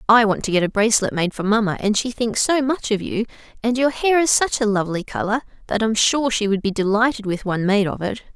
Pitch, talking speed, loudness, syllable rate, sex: 220 Hz, 265 wpm, -20 LUFS, 6.2 syllables/s, female